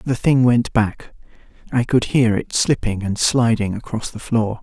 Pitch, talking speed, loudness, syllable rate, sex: 115 Hz, 170 wpm, -19 LUFS, 4.2 syllables/s, male